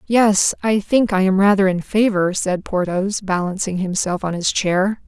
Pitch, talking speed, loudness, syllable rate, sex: 195 Hz, 175 wpm, -18 LUFS, 4.4 syllables/s, female